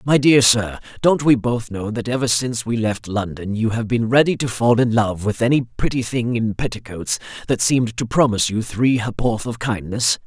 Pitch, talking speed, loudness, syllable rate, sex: 115 Hz, 210 wpm, -19 LUFS, 5.1 syllables/s, male